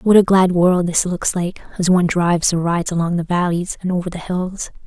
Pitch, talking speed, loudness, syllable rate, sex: 180 Hz, 235 wpm, -17 LUFS, 5.6 syllables/s, female